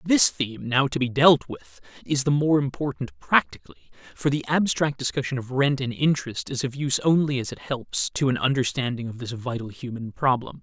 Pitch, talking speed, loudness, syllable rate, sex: 135 Hz, 200 wpm, -24 LUFS, 5.5 syllables/s, male